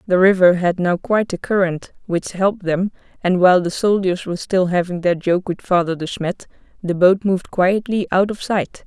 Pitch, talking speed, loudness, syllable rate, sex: 185 Hz, 205 wpm, -18 LUFS, 5.2 syllables/s, female